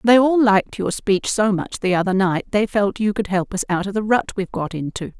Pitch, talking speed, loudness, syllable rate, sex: 200 Hz, 265 wpm, -19 LUFS, 5.5 syllables/s, female